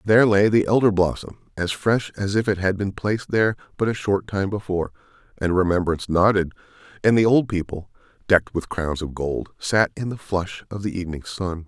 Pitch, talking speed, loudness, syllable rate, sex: 100 Hz, 200 wpm, -22 LUFS, 5.7 syllables/s, male